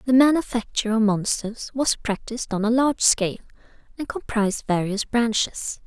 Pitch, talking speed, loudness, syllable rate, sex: 225 Hz, 145 wpm, -22 LUFS, 5.3 syllables/s, female